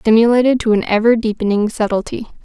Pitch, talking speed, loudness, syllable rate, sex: 220 Hz, 150 wpm, -15 LUFS, 6.2 syllables/s, female